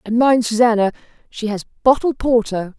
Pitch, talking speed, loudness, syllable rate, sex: 230 Hz, 150 wpm, -17 LUFS, 5.1 syllables/s, female